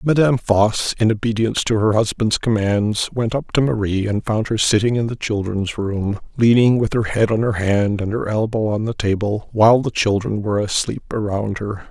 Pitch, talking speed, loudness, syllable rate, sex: 110 Hz, 200 wpm, -18 LUFS, 5.1 syllables/s, male